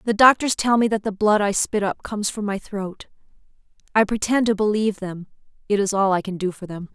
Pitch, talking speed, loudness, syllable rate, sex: 205 Hz, 235 wpm, -21 LUFS, 5.8 syllables/s, female